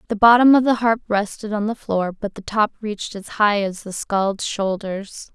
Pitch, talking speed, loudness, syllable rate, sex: 210 Hz, 215 wpm, -20 LUFS, 4.6 syllables/s, female